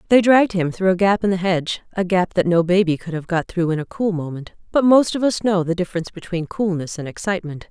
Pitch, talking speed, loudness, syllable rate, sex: 185 Hz, 255 wpm, -19 LUFS, 6.3 syllables/s, female